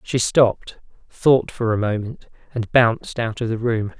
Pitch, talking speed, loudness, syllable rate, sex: 115 Hz, 180 wpm, -20 LUFS, 4.5 syllables/s, male